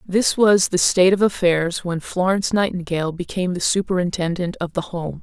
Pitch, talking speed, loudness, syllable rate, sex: 180 Hz, 170 wpm, -19 LUFS, 5.5 syllables/s, female